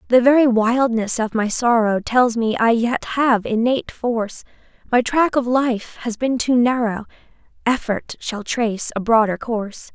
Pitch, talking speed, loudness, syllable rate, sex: 235 Hz, 165 wpm, -19 LUFS, 4.5 syllables/s, female